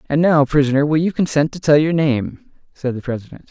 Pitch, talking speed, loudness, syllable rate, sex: 145 Hz, 225 wpm, -17 LUFS, 5.6 syllables/s, male